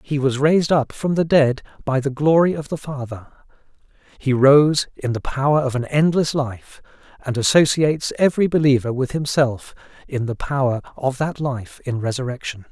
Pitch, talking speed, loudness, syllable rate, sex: 140 Hz, 170 wpm, -19 LUFS, 5.1 syllables/s, male